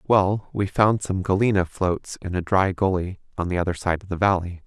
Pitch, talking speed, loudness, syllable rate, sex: 95 Hz, 220 wpm, -23 LUFS, 5.1 syllables/s, male